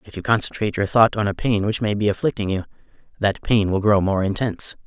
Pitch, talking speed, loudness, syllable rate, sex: 105 Hz, 235 wpm, -20 LUFS, 6.3 syllables/s, male